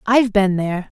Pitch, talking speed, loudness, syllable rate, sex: 205 Hz, 180 wpm, -18 LUFS, 6.3 syllables/s, female